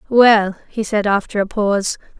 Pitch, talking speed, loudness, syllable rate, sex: 210 Hz, 165 wpm, -17 LUFS, 4.7 syllables/s, female